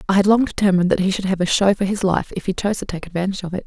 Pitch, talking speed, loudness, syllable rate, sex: 190 Hz, 345 wpm, -19 LUFS, 8.1 syllables/s, female